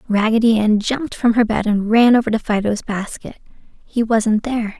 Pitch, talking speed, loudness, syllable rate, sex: 220 Hz, 190 wpm, -17 LUFS, 5.1 syllables/s, female